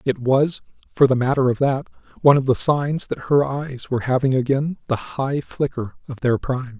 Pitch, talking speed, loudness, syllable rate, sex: 135 Hz, 205 wpm, -20 LUFS, 5.2 syllables/s, male